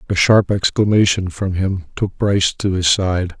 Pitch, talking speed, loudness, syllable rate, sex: 95 Hz, 175 wpm, -17 LUFS, 4.5 syllables/s, male